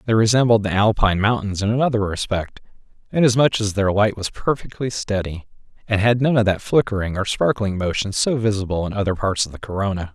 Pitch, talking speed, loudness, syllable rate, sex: 105 Hz, 190 wpm, -20 LUFS, 6.0 syllables/s, male